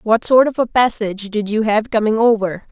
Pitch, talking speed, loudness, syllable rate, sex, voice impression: 220 Hz, 220 wpm, -16 LUFS, 5.4 syllables/s, female, very feminine, very young, very thin, very tensed, powerful, very bright, slightly soft, very clear, slightly fluent, very cute, slightly intellectual, very refreshing, slightly sincere, calm, very friendly, very reassuring, very unique, elegant, slightly wild, very sweet, lively, slightly kind, slightly intense, sharp, very light